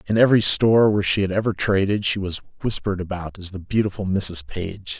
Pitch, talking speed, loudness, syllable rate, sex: 95 Hz, 205 wpm, -20 LUFS, 5.8 syllables/s, male